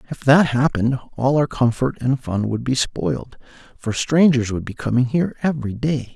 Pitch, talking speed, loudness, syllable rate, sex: 130 Hz, 185 wpm, -20 LUFS, 5.3 syllables/s, male